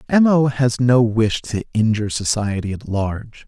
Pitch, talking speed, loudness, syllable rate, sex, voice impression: 115 Hz, 175 wpm, -18 LUFS, 4.6 syllables/s, male, masculine, adult-like, slightly thick, tensed, powerful, bright, soft, intellectual, refreshing, calm, friendly, reassuring, slightly wild, lively, kind